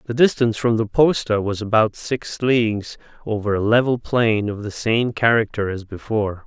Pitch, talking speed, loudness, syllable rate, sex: 110 Hz, 175 wpm, -20 LUFS, 5.0 syllables/s, male